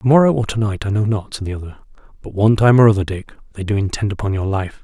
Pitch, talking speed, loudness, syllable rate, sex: 105 Hz, 285 wpm, -17 LUFS, 7.0 syllables/s, male